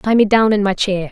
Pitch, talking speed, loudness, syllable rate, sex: 205 Hz, 325 wpm, -15 LUFS, 5.6 syllables/s, female